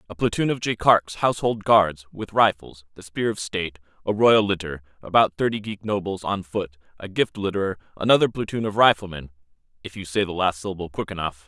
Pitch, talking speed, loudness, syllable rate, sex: 95 Hz, 190 wpm, -22 LUFS, 5.7 syllables/s, male